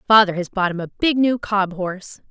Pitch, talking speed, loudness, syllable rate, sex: 200 Hz, 235 wpm, -19 LUFS, 5.6 syllables/s, female